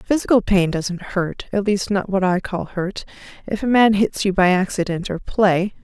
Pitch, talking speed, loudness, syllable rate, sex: 195 Hz, 185 wpm, -19 LUFS, 4.6 syllables/s, female